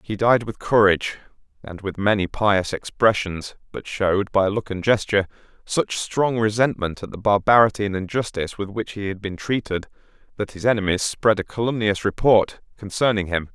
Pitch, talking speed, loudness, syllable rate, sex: 100 Hz, 170 wpm, -21 LUFS, 5.2 syllables/s, male